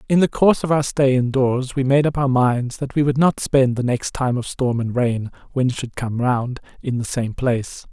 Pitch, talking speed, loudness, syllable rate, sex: 130 Hz, 260 wpm, -20 LUFS, 5.0 syllables/s, male